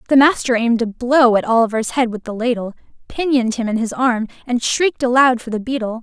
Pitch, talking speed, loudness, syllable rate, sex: 240 Hz, 220 wpm, -17 LUFS, 6.0 syllables/s, female